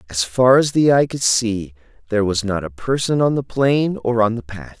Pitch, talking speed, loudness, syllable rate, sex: 115 Hz, 240 wpm, -18 LUFS, 4.9 syllables/s, male